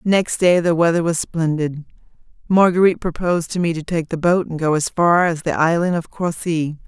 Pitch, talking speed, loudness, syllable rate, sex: 170 Hz, 200 wpm, -18 LUFS, 5.3 syllables/s, female